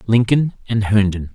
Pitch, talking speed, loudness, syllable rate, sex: 110 Hz, 135 wpm, -17 LUFS, 4.6 syllables/s, male